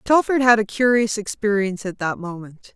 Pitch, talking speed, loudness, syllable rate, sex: 210 Hz, 175 wpm, -19 LUFS, 5.3 syllables/s, female